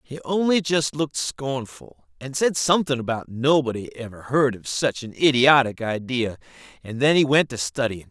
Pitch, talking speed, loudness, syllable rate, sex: 130 Hz, 170 wpm, -22 LUFS, 4.9 syllables/s, male